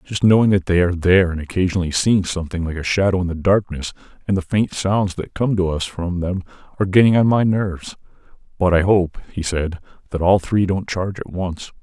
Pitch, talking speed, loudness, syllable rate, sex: 90 Hz, 220 wpm, -19 LUFS, 5.9 syllables/s, male